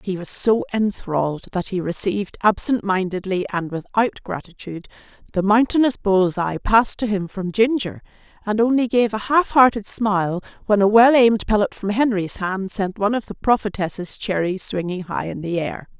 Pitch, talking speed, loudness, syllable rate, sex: 200 Hz, 175 wpm, -20 LUFS, 5.1 syllables/s, female